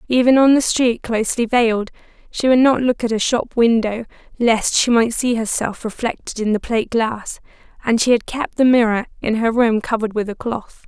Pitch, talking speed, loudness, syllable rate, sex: 235 Hz, 205 wpm, -17 LUFS, 5.3 syllables/s, female